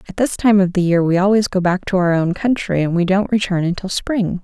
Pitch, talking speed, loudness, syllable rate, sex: 190 Hz, 270 wpm, -17 LUFS, 5.7 syllables/s, female